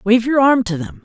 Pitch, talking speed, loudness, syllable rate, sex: 220 Hz, 290 wpm, -15 LUFS, 5.4 syllables/s, male